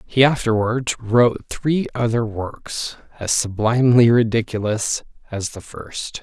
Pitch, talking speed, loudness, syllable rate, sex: 115 Hz, 115 wpm, -20 LUFS, 4.0 syllables/s, male